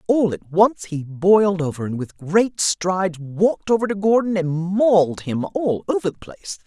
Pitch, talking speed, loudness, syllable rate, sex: 185 Hz, 190 wpm, -20 LUFS, 4.7 syllables/s, female